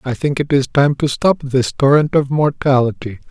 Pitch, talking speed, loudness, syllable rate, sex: 140 Hz, 200 wpm, -15 LUFS, 4.9 syllables/s, male